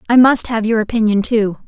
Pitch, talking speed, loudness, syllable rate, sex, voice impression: 220 Hz, 215 wpm, -14 LUFS, 5.6 syllables/s, female, feminine, slightly adult-like, cute, slightly refreshing, slightly sweet, slightly kind